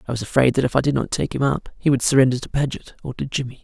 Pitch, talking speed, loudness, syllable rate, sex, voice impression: 130 Hz, 315 wpm, -20 LUFS, 7.1 syllables/s, male, masculine, adult-like, slightly cool, sincere, slightly sweet